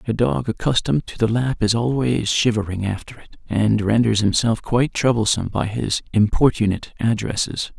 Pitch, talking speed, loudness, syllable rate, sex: 110 Hz, 155 wpm, -20 LUFS, 5.3 syllables/s, male